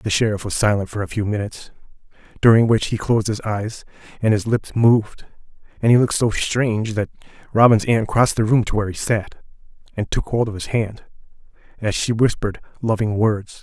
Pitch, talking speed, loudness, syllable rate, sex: 110 Hz, 195 wpm, -19 LUFS, 5.8 syllables/s, male